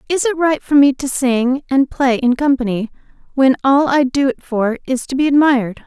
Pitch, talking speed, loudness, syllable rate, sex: 265 Hz, 215 wpm, -15 LUFS, 5.0 syllables/s, female